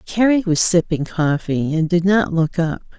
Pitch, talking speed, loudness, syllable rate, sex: 175 Hz, 180 wpm, -18 LUFS, 4.5 syllables/s, female